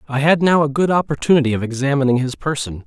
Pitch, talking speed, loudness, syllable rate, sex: 140 Hz, 210 wpm, -17 LUFS, 6.6 syllables/s, male